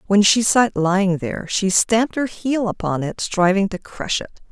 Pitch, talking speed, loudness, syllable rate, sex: 200 Hz, 215 wpm, -19 LUFS, 4.9 syllables/s, female